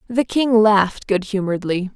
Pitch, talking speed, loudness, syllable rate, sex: 205 Hz, 155 wpm, -18 LUFS, 5.1 syllables/s, female